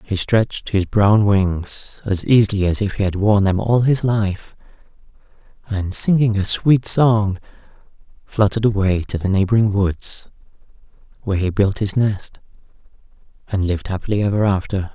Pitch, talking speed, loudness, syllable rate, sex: 100 Hz, 150 wpm, -18 LUFS, 4.8 syllables/s, male